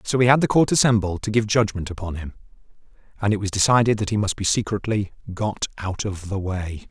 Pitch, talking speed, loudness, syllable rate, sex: 105 Hz, 215 wpm, -22 LUFS, 5.9 syllables/s, male